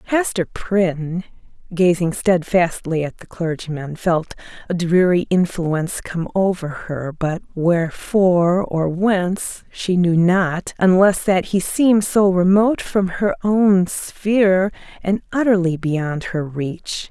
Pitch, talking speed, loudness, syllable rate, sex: 180 Hz, 125 wpm, -18 LUFS, 3.8 syllables/s, female